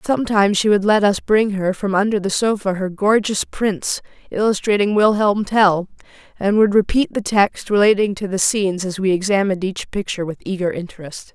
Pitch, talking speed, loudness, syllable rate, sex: 200 Hz, 180 wpm, -18 LUFS, 5.4 syllables/s, female